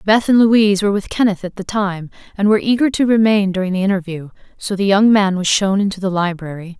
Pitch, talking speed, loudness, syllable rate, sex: 200 Hz, 230 wpm, -15 LUFS, 6.2 syllables/s, female